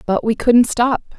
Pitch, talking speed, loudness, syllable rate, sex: 235 Hz, 200 wpm, -15 LUFS, 4.3 syllables/s, female